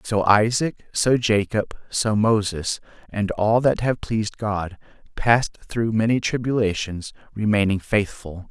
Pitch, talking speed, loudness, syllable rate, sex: 105 Hz, 125 wpm, -22 LUFS, 4.1 syllables/s, male